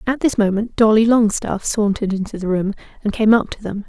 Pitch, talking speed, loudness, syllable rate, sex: 210 Hz, 215 wpm, -18 LUFS, 5.9 syllables/s, female